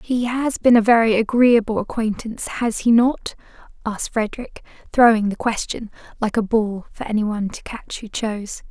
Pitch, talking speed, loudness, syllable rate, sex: 225 Hz, 170 wpm, -19 LUFS, 5.2 syllables/s, female